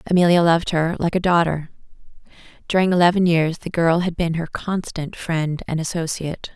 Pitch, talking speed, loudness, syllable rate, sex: 170 Hz, 165 wpm, -20 LUFS, 5.4 syllables/s, female